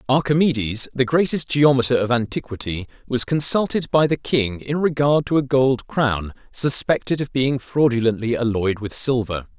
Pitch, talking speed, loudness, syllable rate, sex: 130 Hz, 150 wpm, -20 LUFS, 4.8 syllables/s, male